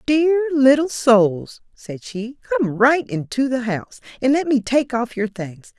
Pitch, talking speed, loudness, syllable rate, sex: 245 Hz, 175 wpm, -19 LUFS, 3.9 syllables/s, female